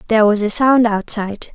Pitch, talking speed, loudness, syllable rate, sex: 215 Hz, 195 wpm, -15 LUFS, 5.9 syllables/s, female